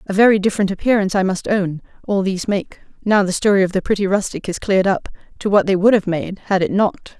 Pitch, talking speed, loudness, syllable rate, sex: 195 Hz, 240 wpm, -18 LUFS, 6.4 syllables/s, female